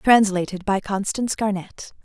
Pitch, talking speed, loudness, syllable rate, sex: 200 Hz, 120 wpm, -22 LUFS, 4.7 syllables/s, female